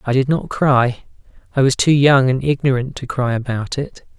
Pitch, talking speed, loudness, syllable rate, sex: 130 Hz, 200 wpm, -17 LUFS, 4.9 syllables/s, male